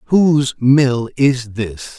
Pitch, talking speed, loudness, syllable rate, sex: 125 Hz, 120 wpm, -15 LUFS, 3.1 syllables/s, male